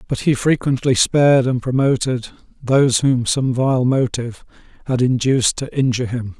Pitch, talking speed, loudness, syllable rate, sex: 130 Hz, 150 wpm, -17 LUFS, 5.1 syllables/s, male